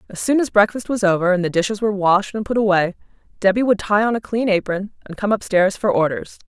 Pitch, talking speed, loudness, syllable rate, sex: 200 Hz, 250 wpm, -18 LUFS, 6.2 syllables/s, female